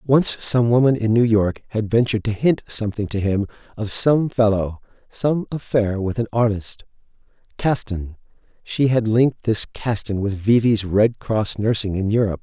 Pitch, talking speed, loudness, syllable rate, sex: 110 Hz, 170 wpm, -20 LUFS, 4.7 syllables/s, male